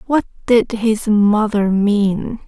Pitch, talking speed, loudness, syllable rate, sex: 215 Hz, 120 wpm, -16 LUFS, 2.9 syllables/s, female